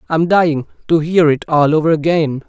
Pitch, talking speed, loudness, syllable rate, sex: 160 Hz, 220 wpm, -14 LUFS, 5.9 syllables/s, male